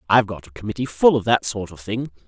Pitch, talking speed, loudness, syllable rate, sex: 105 Hz, 265 wpm, -21 LUFS, 6.6 syllables/s, male